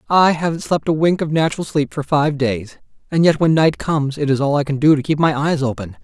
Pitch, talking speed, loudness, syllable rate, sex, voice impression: 145 Hz, 270 wpm, -17 LUFS, 5.9 syllables/s, male, masculine, middle-aged, tensed, powerful, muffled, very fluent, slightly raspy, intellectual, friendly, wild, lively, slightly intense